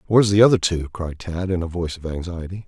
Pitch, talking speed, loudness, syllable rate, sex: 90 Hz, 245 wpm, -21 LUFS, 6.5 syllables/s, male